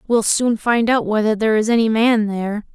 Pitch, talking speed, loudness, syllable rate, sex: 220 Hz, 220 wpm, -17 LUFS, 5.5 syllables/s, female